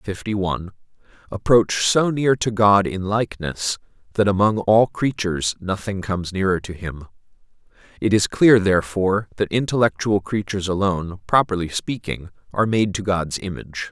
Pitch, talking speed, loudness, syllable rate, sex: 100 Hz, 140 wpm, -20 LUFS, 5.2 syllables/s, male